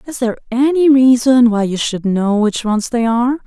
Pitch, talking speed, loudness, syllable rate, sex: 240 Hz, 210 wpm, -14 LUFS, 5.1 syllables/s, female